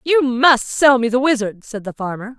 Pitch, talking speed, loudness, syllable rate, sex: 245 Hz, 225 wpm, -16 LUFS, 4.8 syllables/s, female